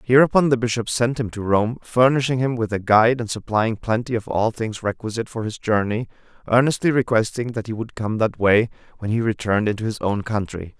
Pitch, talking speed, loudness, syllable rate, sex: 115 Hz, 205 wpm, -21 LUFS, 5.7 syllables/s, male